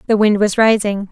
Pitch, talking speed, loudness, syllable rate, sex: 210 Hz, 215 wpm, -14 LUFS, 5.4 syllables/s, female